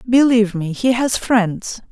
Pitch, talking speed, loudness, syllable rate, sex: 225 Hz, 155 wpm, -16 LUFS, 4.1 syllables/s, female